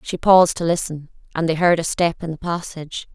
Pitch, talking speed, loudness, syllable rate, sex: 165 Hz, 230 wpm, -19 LUFS, 5.8 syllables/s, female